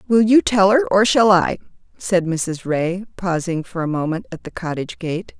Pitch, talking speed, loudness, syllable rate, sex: 185 Hz, 200 wpm, -18 LUFS, 4.7 syllables/s, female